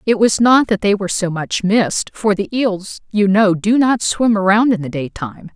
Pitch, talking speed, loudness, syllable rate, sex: 200 Hz, 225 wpm, -15 LUFS, 4.9 syllables/s, female